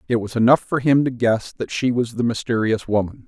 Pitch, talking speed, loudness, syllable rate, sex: 120 Hz, 240 wpm, -20 LUFS, 5.6 syllables/s, male